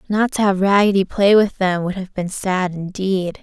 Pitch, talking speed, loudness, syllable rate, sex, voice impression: 190 Hz, 210 wpm, -18 LUFS, 4.6 syllables/s, female, very feminine, slightly adult-like, slightly cute, slightly refreshing